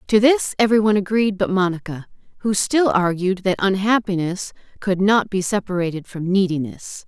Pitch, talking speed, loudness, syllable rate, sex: 195 Hz, 145 wpm, -19 LUFS, 5.1 syllables/s, female